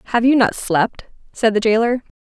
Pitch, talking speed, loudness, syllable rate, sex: 225 Hz, 190 wpm, -17 LUFS, 5.3 syllables/s, female